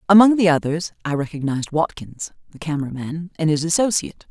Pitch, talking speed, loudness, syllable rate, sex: 165 Hz, 165 wpm, -20 LUFS, 6.1 syllables/s, female